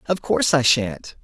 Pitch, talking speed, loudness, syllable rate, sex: 135 Hz, 195 wpm, -19 LUFS, 4.6 syllables/s, male